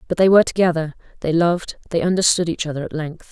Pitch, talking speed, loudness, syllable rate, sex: 165 Hz, 215 wpm, -19 LUFS, 6.9 syllables/s, female